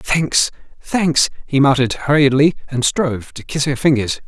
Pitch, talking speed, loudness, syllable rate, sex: 140 Hz, 155 wpm, -16 LUFS, 4.7 syllables/s, male